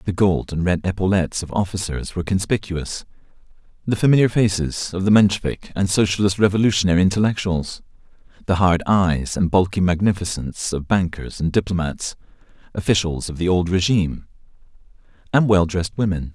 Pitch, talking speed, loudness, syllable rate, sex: 95 Hz, 140 wpm, -20 LUFS, 5.8 syllables/s, male